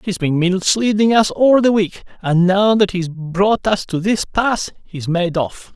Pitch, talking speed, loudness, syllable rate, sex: 190 Hz, 200 wpm, -16 LUFS, 3.9 syllables/s, male